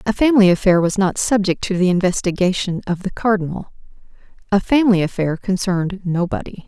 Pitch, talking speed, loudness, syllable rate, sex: 190 Hz, 155 wpm, -18 LUFS, 6.0 syllables/s, female